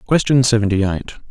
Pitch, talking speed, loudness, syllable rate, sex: 115 Hz, 140 wpm, -16 LUFS, 5.9 syllables/s, male